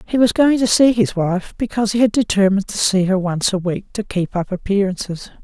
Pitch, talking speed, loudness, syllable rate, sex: 200 Hz, 230 wpm, -17 LUFS, 5.6 syllables/s, female